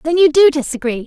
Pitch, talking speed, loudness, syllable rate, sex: 295 Hz, 225 wpm, -13 LUFS, 6.4 syllables/s, female